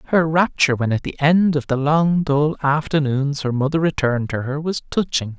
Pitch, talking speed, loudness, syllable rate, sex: 145 Hz, 200 wpm, -19 LUFS, 5.1 syllables/s, male